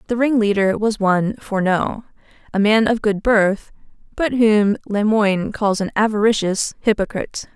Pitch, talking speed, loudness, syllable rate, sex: 210 Hz, 145 wpm, -18 LUFS, 4.6 syllables/s, female